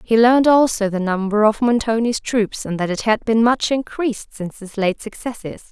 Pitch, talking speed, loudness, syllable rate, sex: 220 Hz, 200 wpm, -18 LUFS, 5.2 syllables/s, female